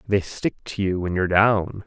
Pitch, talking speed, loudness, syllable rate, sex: 95 Hz, 225 wpm, -22 LUFS, 4.9 syllables/s, male